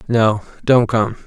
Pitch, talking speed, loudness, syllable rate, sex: 115 Hz, 140 wpm, -16 LUFS, 3.5 syllables/s, male